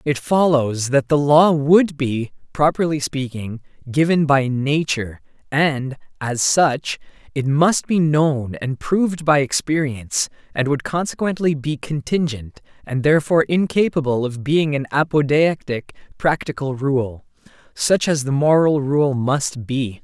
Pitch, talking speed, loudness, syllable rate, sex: 145 Hz, 130 wpm, -19 LUFS, 4.1 syllables/s, male